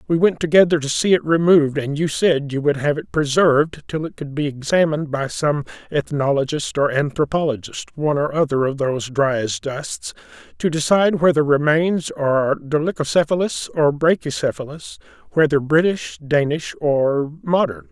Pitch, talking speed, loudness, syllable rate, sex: 150 Hz, 155 wpm, -19 LUFS, 5.1 syllables/s, male